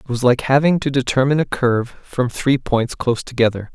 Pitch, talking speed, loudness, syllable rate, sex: 130 Hz, 210 wpm, -18 LUFS, 5.7 syllables/s, male